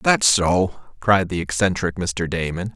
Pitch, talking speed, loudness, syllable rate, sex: 95 Hz, 150 wpm, -20 LUFS, 4.2 syllables/s, male